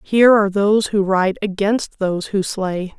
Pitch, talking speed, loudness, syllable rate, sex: 200 Hz, 180 wpm, -17 LUFS, 4.9 syllables/s, female